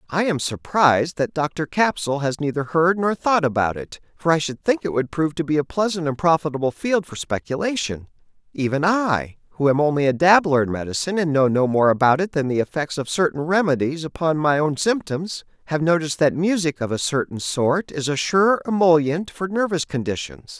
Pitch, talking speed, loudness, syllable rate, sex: 155 Hz, 200 wpm, -21 LUFS, 5.4 syllables/s, male